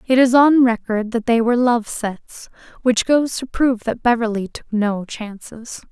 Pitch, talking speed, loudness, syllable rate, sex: 235 Hz, 185 wpm, -18 LUFS, 4.6 syllables/s, female